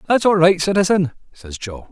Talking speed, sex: 190 wpm, male